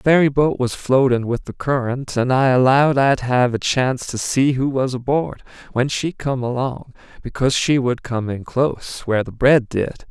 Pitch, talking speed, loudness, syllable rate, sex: 130 Hz, 195 wpm, -19 LUFS, 4.9 syllables/s, male